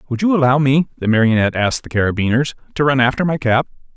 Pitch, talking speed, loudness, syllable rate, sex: 130 Hz, 210 wpm, -16 LUFS, 7.2 syllables/s, male